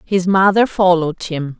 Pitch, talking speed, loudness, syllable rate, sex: 180 Hz, 150 wpm, -15 LUFS, 4.7 syllables/s, female